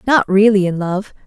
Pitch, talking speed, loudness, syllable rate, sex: 200 Hz, 190 wpm, -15 LUFS, 4.9 syllables/s, female